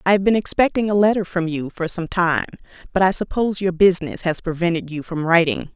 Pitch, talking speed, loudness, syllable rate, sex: 180 Hz, 220 wpm, -19 LUFS, 6.1 syllables/s, female